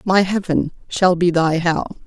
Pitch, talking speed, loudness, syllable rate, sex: 175 Hz, 175 wpm, -18 LUFS, 4.0 syllables/s, female